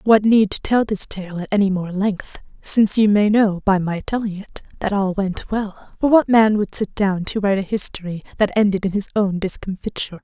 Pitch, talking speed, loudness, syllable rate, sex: 200 Hz, 225 wpm, -19 LUFS, 5.2 syllables/s, female